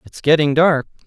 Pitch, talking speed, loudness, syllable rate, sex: 155 Hz, 170 wpm, -16 LUFS, 5.0 syllables/s, male